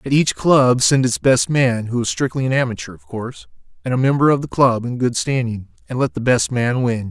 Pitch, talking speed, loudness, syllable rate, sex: 125 Hz, 245 wpm, -18 LUFS, 5.4 syllables/s, male